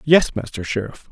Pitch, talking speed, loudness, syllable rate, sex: 125 Hz, 160 wpm, -21 LUFS, 5.0 syllables/s, male